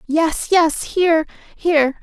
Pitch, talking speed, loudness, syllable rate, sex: 320 Hz, 120 wpm, -17 LUFS, 3.9 syllables/s, female